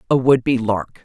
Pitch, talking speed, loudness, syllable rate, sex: 125 Hz, 230 wpm, -17 LUFS, 4.8 syllables/s, female